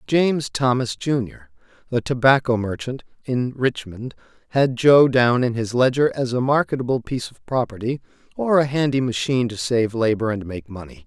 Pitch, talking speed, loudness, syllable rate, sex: 120 Hz, 165 wpm, -20 LUFS, 5.1 syllables/s, male